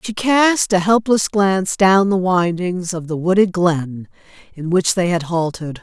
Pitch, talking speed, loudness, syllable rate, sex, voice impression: 185 Hz, 175 wpm, -16 LUFS, 4.2 syllables/s, female, feminine, middle-aged, tensed, powerful, slightly hard, raspy, intellectual, elegant, lively, strict, intense, sharp